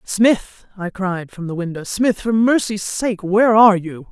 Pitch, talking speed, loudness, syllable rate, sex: 200 Hz, 190 wpm, -17 LUFS, 4.4 syllables/s, female